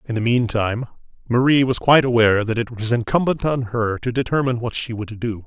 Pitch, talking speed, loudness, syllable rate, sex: 120 Hz, 220 wpm, -19 LUFS, 5.8 syllables/s, male